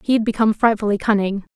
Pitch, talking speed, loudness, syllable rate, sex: 210 Hz, 195 wpm, -18 LUFS, 7.2 syllables/s, female